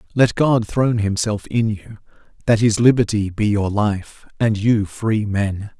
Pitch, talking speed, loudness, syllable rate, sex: 105 Hz, 165 wpm, -19 LUFS, 4.1 syllables/s, male